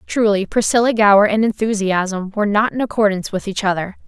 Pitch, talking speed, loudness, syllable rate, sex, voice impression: 210 Hz, 175 wpm, -17 LUFS, 6.0 syllables/s, female, feminine, adult-like, tensed, bright, clear, intellectual, calm, friendly, elegant, slightly sharp, modest